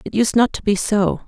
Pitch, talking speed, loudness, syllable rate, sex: 210 Hz, 280 wpm, -18 LUFS, 5.3 syllables/s, female